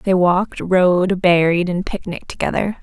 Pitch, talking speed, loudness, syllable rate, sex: 180 Hz, 150 wpm, -17 LUFS, 5.1 syllables/s, female